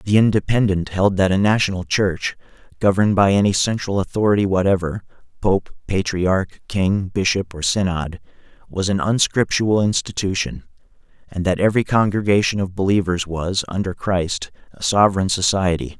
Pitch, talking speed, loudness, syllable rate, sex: 95 Hz, 130 wpm, -19 LUFS, 5.1 syllables/s, male